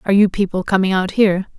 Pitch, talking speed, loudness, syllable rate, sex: 195 Hz, 225 wpm, -16 LUFS, 7.0 syllables/s, female